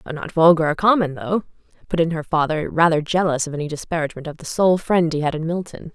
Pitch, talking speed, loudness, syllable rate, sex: 165 Hz, 220 wpm, -20 LUFS, 6.1 syllables/s, female